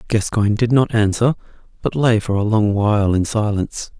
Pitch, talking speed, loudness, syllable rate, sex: 110 Hz, 180 wpm, -18 LUFS, 5.5 syllables/s, male